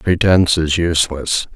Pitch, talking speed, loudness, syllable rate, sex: 85 Hz, 115 wpm, -15 LUFS, 4.8 syllables/s, male